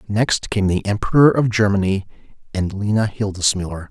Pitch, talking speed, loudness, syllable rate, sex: 105 Hz, 140 wpm, -18 LUFS, 5.4 syllables/s, male